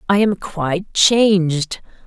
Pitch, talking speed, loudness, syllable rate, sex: 185 Hz, 115 wpm, -16 LUFS, 3.6 syllables/s, female